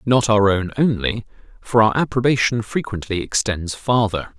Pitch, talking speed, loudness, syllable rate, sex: 110 Hz, 135 wpm, -19 LUFS, 4.6 syllables/s, male